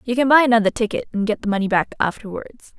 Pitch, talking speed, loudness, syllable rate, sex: 220 Hz, 235 wpm, -18 LUFS, 6.5 syllables/s, female